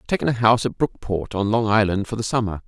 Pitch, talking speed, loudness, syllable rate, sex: 110 Hz, 270 wpm, -21 LUFS, 6.9 syllables/s, male